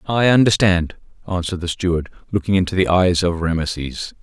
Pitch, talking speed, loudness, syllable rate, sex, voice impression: 90 Hz, 155 wpm, -18 LUFS, 5.6 syllables/s, male, very masculine, adult-like, slightly middle-aged, thick, very tensed, powerful, very bright, hard, very clear, very fluent, slightly raspy, cool, intellectual, very refreshing, sincere, very calm, slightly mature, very friendly, very reassuring, very unique, slightly elegant, wild, sweet, very lively, kind, slightly intense, very modest